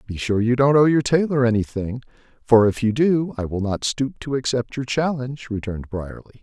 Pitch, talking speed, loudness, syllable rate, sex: 120 Hz, 215 wpm, -21 LUFS, 5.5 syllables/s, male